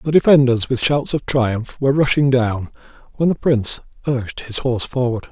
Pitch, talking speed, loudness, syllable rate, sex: 125 Hz, 180 wpm, -18 LUFS, 5.4 syllables/s, male